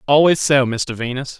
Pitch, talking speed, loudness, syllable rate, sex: 135 Hz, 175 wpm, -17 LUFS, 4.9 syllables/s, male